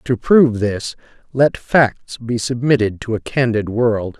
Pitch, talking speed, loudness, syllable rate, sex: 120 Hz, 155 wpm, -17 LUFS, 4.0 syllables/s, male